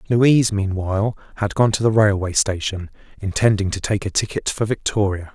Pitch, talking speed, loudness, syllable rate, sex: 105 Hz, 170 wpm, -20 LUFS, 5.4 syllables/s, male